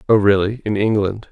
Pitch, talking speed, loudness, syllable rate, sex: 105 Hz, 135 wpm, -17 LUFS, 5.5 syllables/s, male